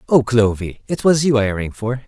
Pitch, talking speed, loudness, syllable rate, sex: 120 Hz, 230 wpm, -18 LUFS, 4.9 syllables/s, male